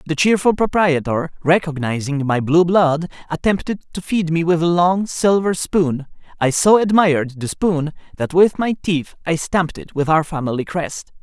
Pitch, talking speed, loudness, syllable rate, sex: 165 Hz, 170 wpm, -18 LUFS, 4.7 syllables/s, male